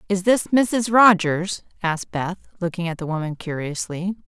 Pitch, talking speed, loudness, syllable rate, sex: 180 Hz, 155 wpm, -21 LUFS, 4.6 syllables/s, female